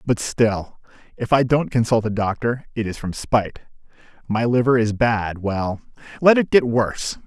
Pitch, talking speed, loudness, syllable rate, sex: 115 Hz, 165 wpm, -20 LUFS, 4.7 syllables/s, male